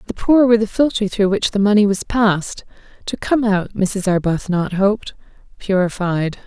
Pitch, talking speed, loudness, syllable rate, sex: 200 Hz, 165 wpm, -17 LUFS, 5.0 syllables/s, female